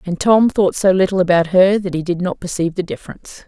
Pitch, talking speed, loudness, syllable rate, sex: 180 Hz, 240 wpm, -16 LUFS, 6.2 syllables/s, female